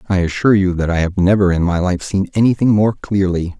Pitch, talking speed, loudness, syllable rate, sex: 95 Hz, 235 wpm, -15 LUFS, 6.0 syllables/s, male